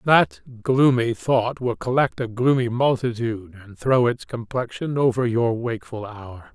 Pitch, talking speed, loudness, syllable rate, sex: 120 Hz, 145 wpm, -22 LUFS, 4.4 syllables/s, male